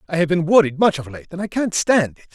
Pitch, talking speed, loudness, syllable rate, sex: 170 Hz, 305 wpm, -18 LUFS, 6.3 syllables/s, male